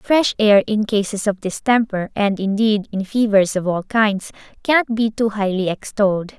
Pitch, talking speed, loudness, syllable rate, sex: 210 Hz, 170 wpm, -18 LUFS, 4.7 syllables/s, female